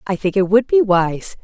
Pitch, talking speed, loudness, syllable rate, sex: 205 Hz, 250 wpm, -16 LUFS, 4.7 syllables/s, female